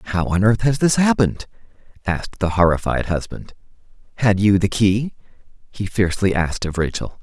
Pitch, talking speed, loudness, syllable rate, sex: 100 Hz, 160 wpm, -19 LUFS, 5.4 syllables/s, male